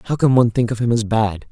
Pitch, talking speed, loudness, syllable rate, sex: 115 Hz, 315 wpm, -17 LUFS, 6.8 syllables/s, male